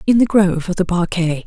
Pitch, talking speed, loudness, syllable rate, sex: 185 Hz, 245 wpm, -16 LUFS, 6.0 syllables/s, female